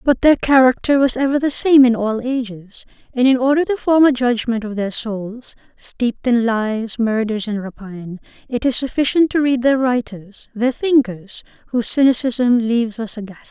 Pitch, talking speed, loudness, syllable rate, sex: 240 Hz, 180 wpm, -17 LUFS, 4.9 syllables/s, female